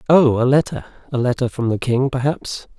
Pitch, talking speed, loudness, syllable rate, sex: 130 Hz, 195 wpm, -19 LUFS, 5.3 syllables/s, male